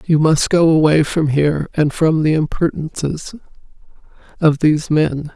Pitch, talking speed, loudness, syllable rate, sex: 155 Hz, 145 wpm, -16 LUFS, 4.8 syllables/s, female